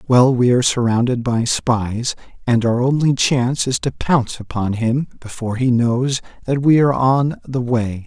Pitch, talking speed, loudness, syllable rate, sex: 125 Hz, 180 wpm, -18 LUFS, 4.7 syllables/s, male